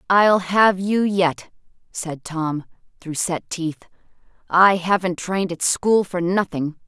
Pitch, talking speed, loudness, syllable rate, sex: 180 Hz, 140 wpm, -20 LUFS, 3.6 syllables/s, female